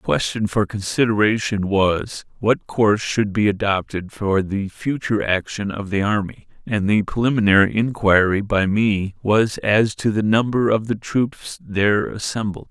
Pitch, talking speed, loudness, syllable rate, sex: 105 Hz, 155 wpm, -19 LUFS, 4.5 syllables/s, male